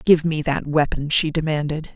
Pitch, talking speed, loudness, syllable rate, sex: 155 Hz, 185 wpm, -21 LUFS, 4.9 syllables/s, female